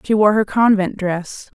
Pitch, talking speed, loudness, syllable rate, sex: 200 Hz, 190 wpm, -17 LUFS, 4.2 syllables/s, female